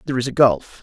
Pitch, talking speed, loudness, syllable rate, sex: 125 Hz, 290 wpm, -17 LUFS, 7.0 syllables/s, male